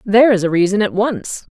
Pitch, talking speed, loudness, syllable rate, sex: 210 Hz, 230 wpm, -15 LUFS, 5.8 syllables/s, female